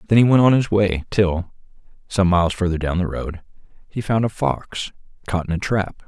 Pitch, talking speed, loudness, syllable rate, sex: 95 Hz, 205 wpm, -20 LUFS, 5.1 syllables/s, male